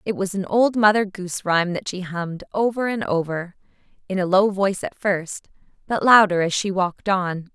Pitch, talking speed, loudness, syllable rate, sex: 190 Hz, 200 wpm, -21 LUFS, 5.3 syllables/s, female